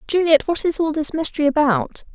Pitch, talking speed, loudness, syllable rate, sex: 305 Hz, 195 wpm, -18 LUFS, 5.7 syllables/s, female